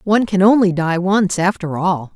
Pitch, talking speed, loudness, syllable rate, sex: 185 Hz, 195 wpm, -16 LUFS, 4.9 syllables/s, female